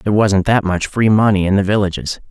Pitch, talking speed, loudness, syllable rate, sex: 100 Hz, 235 wpm, -15 LUFS, 5.9 syllables/s, male